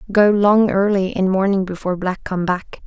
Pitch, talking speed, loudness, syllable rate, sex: 195 Hz, 190 wpm, -18 LUFS, 5.0 syllables/s, female